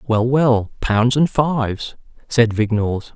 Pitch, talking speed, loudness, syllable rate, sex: 120 Hz, 135 wpm, -18 LUFS, 3.8 syllables/s, male